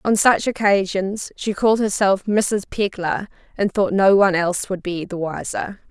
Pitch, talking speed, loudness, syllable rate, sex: 195 Hz, 175 wpm, -19 LUFS, 4.7 syllables/s, female